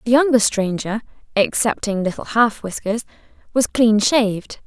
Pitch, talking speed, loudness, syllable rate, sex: 225 Hz, 130 wpm, -19 LUFS, 3.2 syllables/s, female